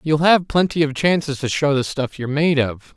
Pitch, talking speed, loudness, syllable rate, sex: 150 Hz, 245 wpm, -19 LUFS, 5.3 syllables/s, male